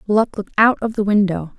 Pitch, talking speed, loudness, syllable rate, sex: 205 Hz, 230 wpm, -17 LUFS, 5.9 syllables/s, female